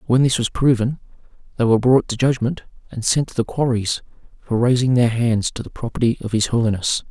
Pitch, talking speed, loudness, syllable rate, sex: 120 Hz, 205 wpm, -19 LUFS, 5.8 syllables/s, male